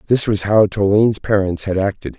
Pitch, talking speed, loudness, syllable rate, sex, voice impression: 100 Hz, 190 wpm, -16 LUFS, 5.5 syllables/s, male, very masculine, very adult-like, slightly thick, slightly muffled, cool, sincere, slightly friendly, reassuring, slightly kind